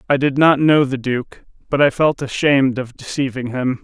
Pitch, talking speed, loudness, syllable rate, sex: 135 Hz, 205 wpm, -17 LUFS, 5.0 syllables/s, male